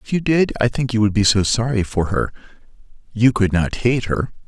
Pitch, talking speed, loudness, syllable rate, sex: 110 Hz, 230 wpm, -18 LUFS, 5.3 syllables/s, male